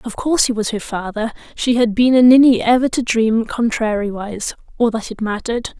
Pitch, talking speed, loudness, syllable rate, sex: 230 Hz, 195 wpm, -16 LUFS, 5.5 syllables/s, female